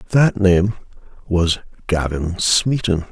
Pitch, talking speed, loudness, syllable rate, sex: 95 Hz, 95 wpm, -18 LUFS, 3.5 syllables/s, male